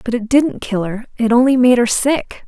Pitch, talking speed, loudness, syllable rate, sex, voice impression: 240 Hz, 240 wpm, -15 LUFS, 4.9 syllables/s, female, feminine, adult-like, slightly intellectual, slightly friendly